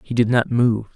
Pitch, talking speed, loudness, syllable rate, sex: 115 Hz, 250 wpm, -19 LUFS, 5.0 syllables/s, male